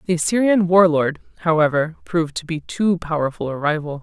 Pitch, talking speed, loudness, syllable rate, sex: 165 Hz, 180 wpm, -19 LUFS, 5.6 syllables/s, female